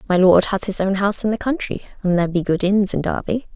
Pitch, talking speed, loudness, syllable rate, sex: 195 Hz, 270 wpm, -19 LUFS, 6.3 syllables/s, female